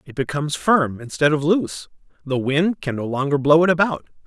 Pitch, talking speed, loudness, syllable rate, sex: 150 Hz, 195 wpm, -20 LUFS, 5.6 syllables/s, male